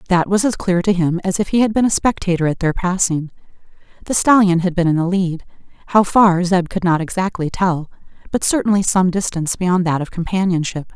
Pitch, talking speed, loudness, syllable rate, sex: 185 Hz, 205 wpm, -17 LUFS, 5.6 syllables/s, female